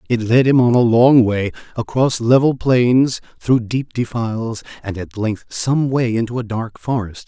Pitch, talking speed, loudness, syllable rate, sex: 120 Hz, 180 wpm, -17 LUFS, 4.3 syllables/s, male